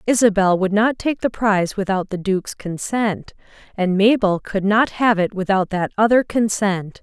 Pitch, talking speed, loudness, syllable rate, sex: 205 Hz, 160 wpm, -19 LUFS, 4.7 syllables/s, female